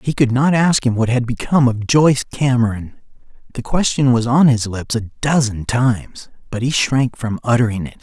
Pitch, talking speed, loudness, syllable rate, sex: 125 Hz, 195 wpm, -16 LUFS, 5.1 syllables/s, male